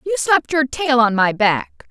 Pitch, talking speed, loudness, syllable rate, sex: 245 Hz, 220 wpm, -16 LUFS, 4.6 syllables/s, female